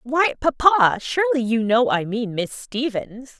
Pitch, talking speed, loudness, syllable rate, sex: 240 Hz, 160 wpm, -20 LUFS, 4.1 syllables/s, female